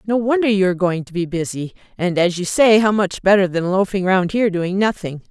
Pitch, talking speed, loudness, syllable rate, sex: 190 Hz, 235 wpm, -17 LUFS, 5.7 syllables/s, female